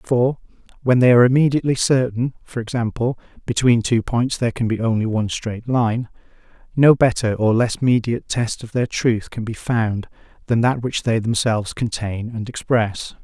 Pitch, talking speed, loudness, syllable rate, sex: 120 Hz, 170 wpm, -19 LUFS, 5.3 syllables/s, male